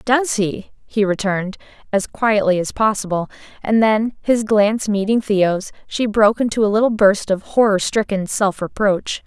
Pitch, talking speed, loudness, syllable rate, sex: 210 Hz, 160 wpm, -18 LUFS, 4.7 syllables/s, female